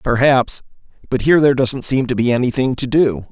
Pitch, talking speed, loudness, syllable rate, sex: 130 Hz, 200 wpm, -16 LUFS, 5.8 syllables/s, male